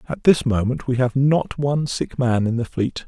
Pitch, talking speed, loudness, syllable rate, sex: 130 Hz, 235 wpm, -20 LUFS, 4.8 syllables/s, male